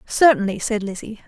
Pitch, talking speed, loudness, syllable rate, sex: 215 Hz, 140 wpm, -19 LUFS, 5.3 syllables/s, female